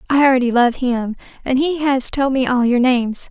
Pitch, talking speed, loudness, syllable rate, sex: 255 Hz, 220 wpm, -16 LUFS, 5.3 syllables/s, female